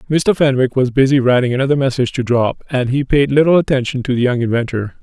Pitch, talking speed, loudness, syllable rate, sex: 130 Hz, 215 wpm, -15 LUFS, 6.4 syllables/s, male